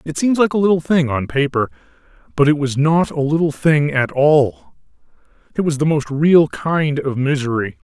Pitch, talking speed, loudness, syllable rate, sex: 140 Hz, 190 wpm, -17 LUFS, 4.8 syllables/s, male